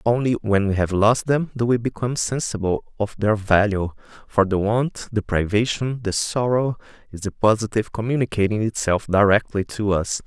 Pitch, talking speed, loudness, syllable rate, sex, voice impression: 110 Hz, 165 wpm, -21 LUFS, 5.1 syllables/s, male, masculine, adult-like, tensed, slightly powerful, clear, slightly halting, sincere, calm, friendly, wild, lively